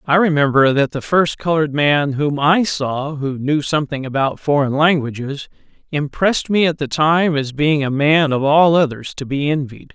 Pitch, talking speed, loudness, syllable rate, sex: 150 Hz, 185 wpm, -17 LUFS, 4.8 syllables/s, male